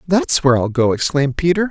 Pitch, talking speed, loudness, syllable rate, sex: 150 Hz, 210 wpm, -16 LUFS, 6.4 syllables/s, male